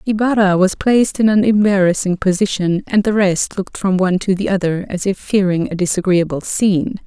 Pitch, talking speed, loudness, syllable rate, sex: 190 Hz, 185 wpm, -16 LUFS, 5.6 syllables/s, female